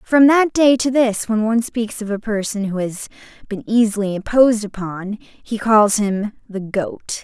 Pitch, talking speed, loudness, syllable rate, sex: 220 Hz, 185 wpm, -18 LUFS, 4.4 syllables/s, female